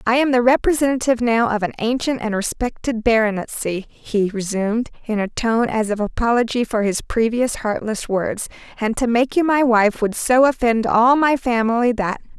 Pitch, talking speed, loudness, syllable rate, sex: 230 Hz, 180 wpm, -19 LUFS, 5.1 syllables/s, female